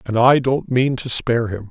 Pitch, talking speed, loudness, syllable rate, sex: 120 Hz, 245 wpm, -18 LUFS, 5.0 syllables/s, male